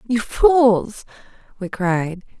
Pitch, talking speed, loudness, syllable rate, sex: 210 Hz, 100 wpm, -18 LUFS, 2.5 syllables/s, female